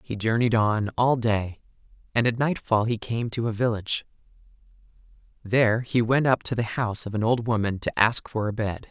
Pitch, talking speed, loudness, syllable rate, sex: 115 Hz, 195 wpm, -24 LUFS, 5.2 syllables/s, male